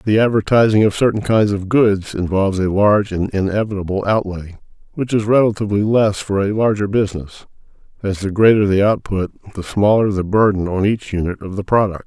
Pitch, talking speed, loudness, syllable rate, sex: 100 Hz, 180 wpm, -17 LUFS, 5.8 syllables/s, male